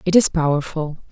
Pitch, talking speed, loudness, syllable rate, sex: 160 Hz, 160 wpm, -19 LUFS, 5.3 syllables/s, female